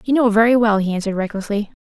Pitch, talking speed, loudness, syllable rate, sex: 215 Hz, 230 wpm, -17 LUFS, 7.3 syllables/s, female